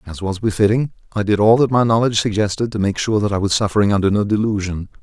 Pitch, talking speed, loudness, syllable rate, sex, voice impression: 105 Hz, 240 wpm, -17 LUFS, 6.7 syllables/s, male, masculine, adult-like, powerful, slightly dark, clear, cool, intellectual, calm, mature, wild, lively, slightly modest